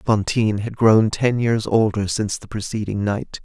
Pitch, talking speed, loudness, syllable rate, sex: 110 Hz, 175 wpm, -20 LUFS, 4.9 syllables/s, male